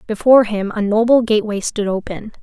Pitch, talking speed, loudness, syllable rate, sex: 215 Hz, 175 wpm, -16 LUFS, 6.0 syllables/s, female